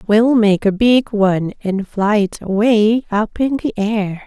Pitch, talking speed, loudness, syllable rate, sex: 215 Hz, 185 wpm, -16 LUFS, 3.9 syllables/s, female